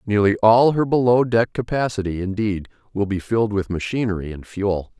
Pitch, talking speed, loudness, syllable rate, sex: 105 Hz, 170 wpm, -20 LUFS, 5.3 syllables/s, male